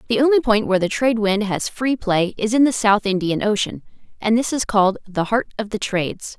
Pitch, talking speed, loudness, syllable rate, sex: 215 Hz, 235 wpm, -19 LUFS, 5.7 syllables/s, female